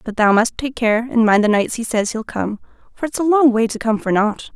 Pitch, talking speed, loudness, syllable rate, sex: 230 Hz, 290 wpm, -17 LUFS, 5.4 syllables/s, female